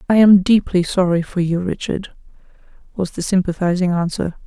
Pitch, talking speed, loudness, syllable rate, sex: 185 Hz, 150 wpm, -17 LUFS, 5.3 syllables/s, female